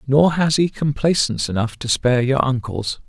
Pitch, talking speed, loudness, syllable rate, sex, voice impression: 130 Hz, 175 wpm, -19 LUFS, 5.2 syllables/s, male, very masculine, very adult-like, very middle-aged, very thick, slightly relaxed, slightly weak, slightly dark, slightly soft, slightly muffled, slightly fluent, slightly cool, intellectual, sincere, very calm, mature, friendly, reassuring, slightly unique, wild, slightly sweet, kind, modest